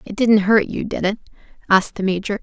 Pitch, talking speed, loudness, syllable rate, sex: 205 Hz, 225 wpm, -18 LUFS, 6.0 syllables/s, female